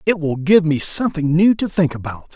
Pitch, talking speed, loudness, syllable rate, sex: 165 Hz, 230 wpm, -17 LUFS, 5.3 syllables/s, male